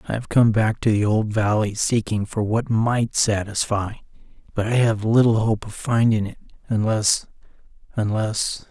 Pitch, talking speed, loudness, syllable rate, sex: 110 Hz, 150 wpm, -21 LUFS, 4.5 syllables/s, male